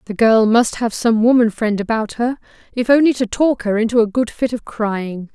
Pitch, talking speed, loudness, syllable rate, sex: 230 Hz, 225 wpm, -16 LUFS, 5.0 syllables/s, female